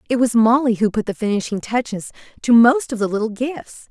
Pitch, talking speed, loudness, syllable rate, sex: 230 Hz, 215 wpm, -18 LUFS, 5.7 syllables/s, female